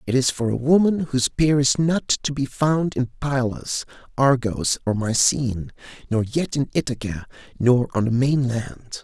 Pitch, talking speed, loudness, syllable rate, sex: 130 Hz, 165 wpm, -21 LUFS, 4.4 syllables/s, male